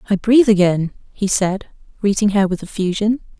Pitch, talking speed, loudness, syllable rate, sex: 200 Hz, 160 wpm, -17 LUFS, 5.4 syllables/s, female